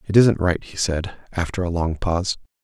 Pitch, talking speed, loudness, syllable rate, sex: 90 Hz, 205 wpm, -22 LUFS, 5.1 syllables/s, male